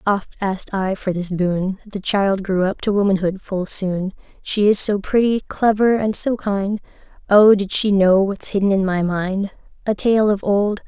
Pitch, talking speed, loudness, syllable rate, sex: 200 Hz, 195 wpm, -19 LUFS, 4.4 syllables/s, female